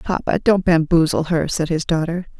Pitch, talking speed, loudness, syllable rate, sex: 170 Hz, 175 wpm, -18 LUFS, 5.0 syllables/s, female